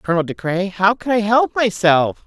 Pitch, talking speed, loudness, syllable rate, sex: 200 Hz, 210 wpm, -17 LUFS, 4.9 syllables/s, female